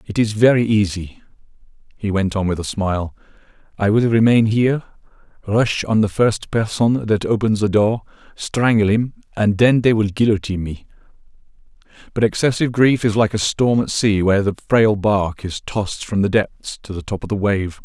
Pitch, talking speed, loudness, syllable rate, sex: 105 Hz, 185 wpm, -18 LUFS, 5.2 syllables/s, male